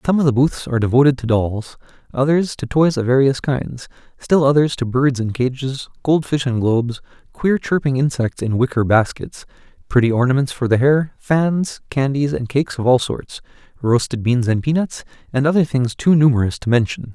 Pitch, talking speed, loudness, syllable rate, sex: 130 Hz, 180 wpm, -18 LUFS, 5.1 syllables/s, male